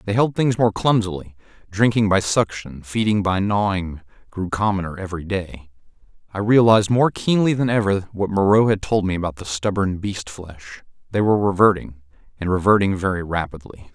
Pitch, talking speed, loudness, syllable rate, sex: 100 Hz, 165 wpm, -20 LUFS, 5.3 syllables/s, male